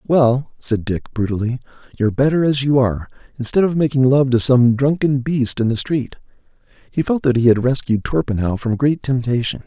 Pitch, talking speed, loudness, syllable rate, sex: 130 Hz, 185 wpm, -17 LUFS, 5.3 syllables/s, male